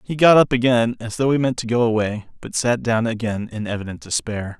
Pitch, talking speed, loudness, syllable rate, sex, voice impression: 115 Hz, 235 wpm, -20 LUFS, 5.6 syllables/s, male, masculine, adult-like, slightly middle-aged, slightly thick, slightly tensed, slightly weak, bright, slightly soft, clear, fluent, slightly cool, slightly intellectual, refreshing, sincere, calm, slightly friendly, slightly reassuring, slightly elegant, slightly lively, slightly kind, slightly modest